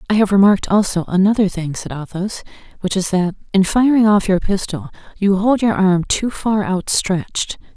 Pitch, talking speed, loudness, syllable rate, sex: 195 Hz, 180 wpm, -17 LUFS, 5.1 syllables/s, female